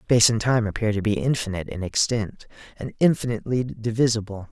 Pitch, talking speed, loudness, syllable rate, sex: 110 Hz, 160 wpm, -23 LUFS, 6.1 syllables/s, male